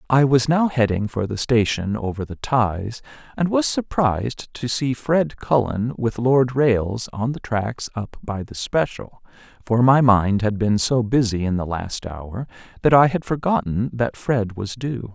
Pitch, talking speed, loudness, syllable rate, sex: 120 Hz, 180 wpm, -21 LUFS, 4.2 syllables/s, male